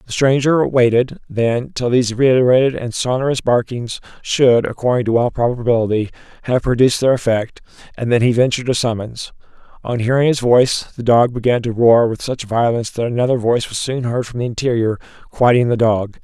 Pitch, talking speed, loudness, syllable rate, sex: 120 Hz, 180 wpm, -16 LUFS, 5.7 syllables/s, male